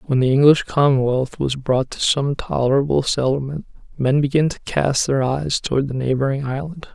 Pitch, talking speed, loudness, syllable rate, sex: 135 Hz, 175 wpm, -19 LUFS, 5.1 syllables/s, male